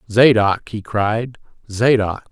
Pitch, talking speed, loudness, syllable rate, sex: 110 Hz, 80 wpm, -17 LUFS, 3.4 syllables/s, male